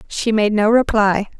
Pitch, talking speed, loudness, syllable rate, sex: 215 Hz, 170 wpm, -16 LUFS, 4.3 syllables/s, female